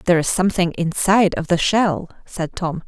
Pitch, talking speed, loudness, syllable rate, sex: 175 Hz, 190 wpm, -19 LUFS, 5.2 syllables/s, female